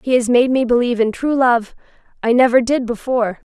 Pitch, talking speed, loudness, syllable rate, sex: 240 Hz, 205 wpm, -16 LUFS, 6.0 syllables/s, female